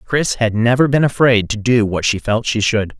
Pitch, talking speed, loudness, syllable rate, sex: 115 Hz, 240 wpm, -15 LUFS, 4.8 syllables/s, male